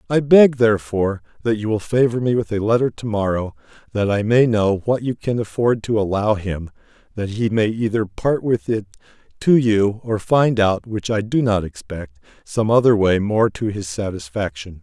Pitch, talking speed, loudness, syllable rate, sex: 110 Hz, 195 wpm, -19 LUFS, 4.7 syllables/s, male